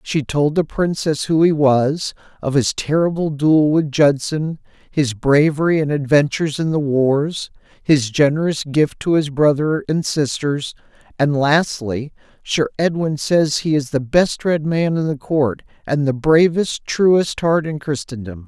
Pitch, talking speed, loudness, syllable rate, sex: 150 Hz, 160 wpm, -18 LUFS, 4.1 syllables/s, male